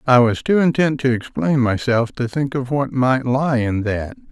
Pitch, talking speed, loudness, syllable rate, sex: 130 Hz, 210 wpm, -18 LUFS, 4.4 syllables/s, male